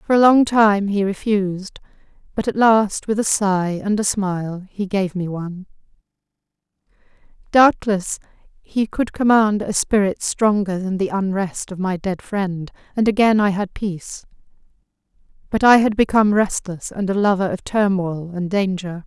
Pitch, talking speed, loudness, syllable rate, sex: 200 Hz, 155 wpm, -19 LUFS, 4.6 syllables/s, female